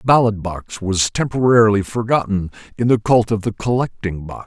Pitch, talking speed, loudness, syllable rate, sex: 105 Hz, 175 wpm, -18 LUFS, 5.3 syllables/s, male